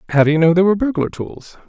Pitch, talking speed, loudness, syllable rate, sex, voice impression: 175 Hz, 285 wpm, -15 LUFS, 7.6 syllables/s, male, masculine, very adult-like, slightly muffled, fluent, sincere, friendly, reassuring